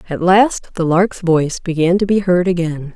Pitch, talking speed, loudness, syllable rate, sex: 175 Hz, 205 wpm, -15 LUFS, 4.9 syllables/s, female